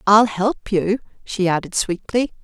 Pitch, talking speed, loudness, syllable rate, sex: 205 Hz, 150 wpm, -20 LUFS, 4.0 syllables/s, female